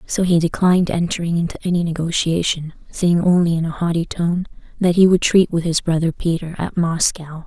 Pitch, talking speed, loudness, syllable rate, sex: 170 Hz, 185 wpm, -18 LUFS, 5.5 syllables/s, female